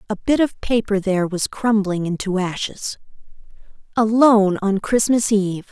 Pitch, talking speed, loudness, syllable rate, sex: 210 Hz, 135 wpm, -19 LUFS, 5.0 syllables/s, female